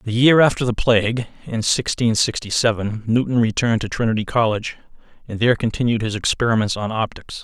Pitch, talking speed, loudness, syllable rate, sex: 115 Hz, 170 wpm, -19 LUFS, 5.9 syllables/s, male